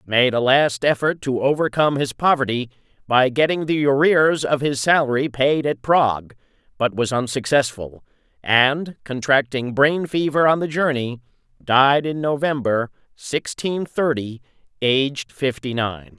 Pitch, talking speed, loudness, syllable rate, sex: 135 Hz, 135 wpm, -19 LUFS, 4.3 syllables/s, male